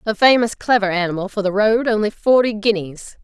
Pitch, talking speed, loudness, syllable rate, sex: 210 Hz, 165 wpm, -17 LUFS, 5.5 syllables/s, female